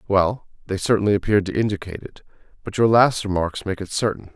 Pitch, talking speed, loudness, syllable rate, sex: 100 Hz, 195 wpm, -21 LUFS, 6.4 syllables/s, male